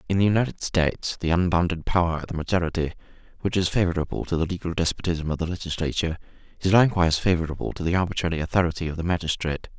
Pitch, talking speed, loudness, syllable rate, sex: 85 Hz, 185 wpm, -24 LUFS, 7.5 syllables/s, male